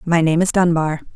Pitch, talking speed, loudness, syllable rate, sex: 165 Hz, 210 wpm, -17 LUFS, 5.5 syllables/s, female